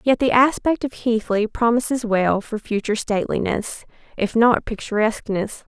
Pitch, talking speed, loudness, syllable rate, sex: 225 Hz, 135 wpm, -20 LUFS, 4.9 syllables/s, female